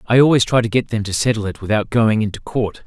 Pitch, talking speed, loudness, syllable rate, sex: 110 Hz, 275 wpm, -17 LUFS, 6.2 syllables/s, male